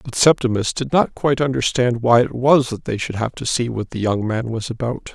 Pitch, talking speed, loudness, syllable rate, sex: 120 Hz, 245 wpm, -19 LUFS, 5.4 syllables/s, male